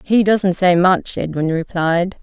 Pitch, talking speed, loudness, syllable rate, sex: 180 Hz, 160 wpm, -16 LUFS, 3.8 syllables/s, female